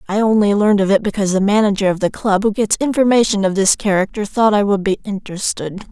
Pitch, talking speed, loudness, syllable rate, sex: 205 Hz, 225 wpm, -16 LUFS, 6.2 syllables/s, female